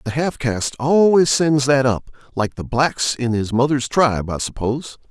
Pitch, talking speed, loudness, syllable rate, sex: 130 Hz, 175 wpm, -18 LUFS, 4.8 syllables/s, male